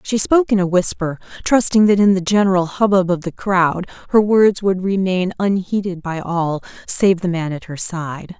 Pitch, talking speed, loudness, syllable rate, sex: 185 Hz, 195 wpm, -17 LUFS, 4.8 syllables/s, female